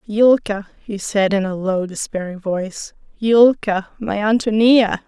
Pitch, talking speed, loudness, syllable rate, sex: 205 Hz, 130 wpm, -18 LUFS, 4.2 syllables/s, female